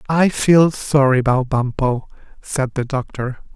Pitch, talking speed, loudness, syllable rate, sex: 135 Hz, 135 wpm, -18 LUFS, 4.1 syllables/s, male